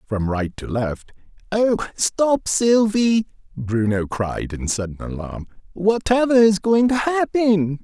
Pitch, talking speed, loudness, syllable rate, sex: 175 Hz, 125 wpm, -20 LUFS, 3.7 syllables/s, male